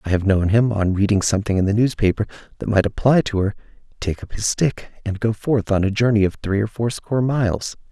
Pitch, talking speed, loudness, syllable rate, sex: 105 Hz, 225 wpm, -20 LUFS, 5.8 syllables/s, male